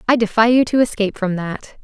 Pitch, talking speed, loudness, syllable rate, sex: 220 Hz, 230 wpm, -17 LUFS, 6.1 syllables/s, female